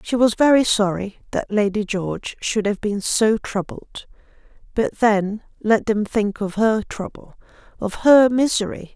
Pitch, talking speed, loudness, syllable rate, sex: 215 Hz, 145 wpm, -20 LUFS, 4.4 syllables/s, female